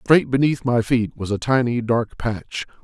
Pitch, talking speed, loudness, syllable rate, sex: 120 Hz, 190 wpm, -21 LUFS, 4.2 syllables/s, male